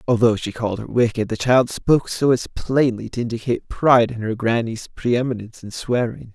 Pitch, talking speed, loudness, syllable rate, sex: 120 Hz, 200 wpm, -20 LUFS, 5.7 syllables/s, male